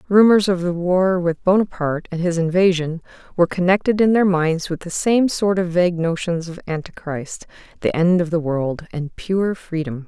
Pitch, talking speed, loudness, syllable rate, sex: 175 Hz, 185 wpm, -19 LUFS, 4.9 syllables/s, female